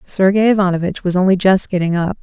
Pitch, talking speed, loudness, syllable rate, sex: 185 Hz, 190 wpm, -15 LUFS, 6.3 syllables/s, female